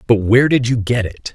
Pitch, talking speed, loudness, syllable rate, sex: 115 Hz, 265 wpm, -15 LUFS, 5.9 syllables/s, male